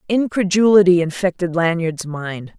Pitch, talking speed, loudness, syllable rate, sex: 180 Hz, 95 wpm, -17 LUFS, 4.6 syllables/s, female